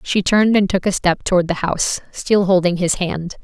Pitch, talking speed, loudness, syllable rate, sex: 185 Hz, 225 wpm, -17 LUFS, 5.4 syllables/s, female